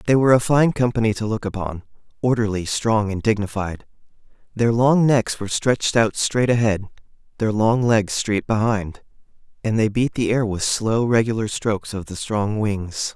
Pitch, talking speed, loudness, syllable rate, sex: 110 Hz, 175 wpm, -20 LUFS, 4.9 syllables/s, male